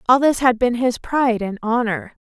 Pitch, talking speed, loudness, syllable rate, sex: 240 Hz, 215 wpm, -19 LUFS, 5.1 syllables/s, female